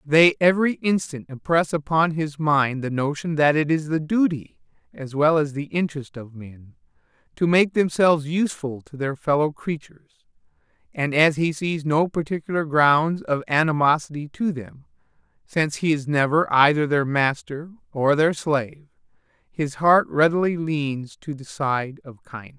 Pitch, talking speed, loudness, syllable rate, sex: 150 Hz, 155 wpm, -21 LUFS, 4.7 syllables/s, male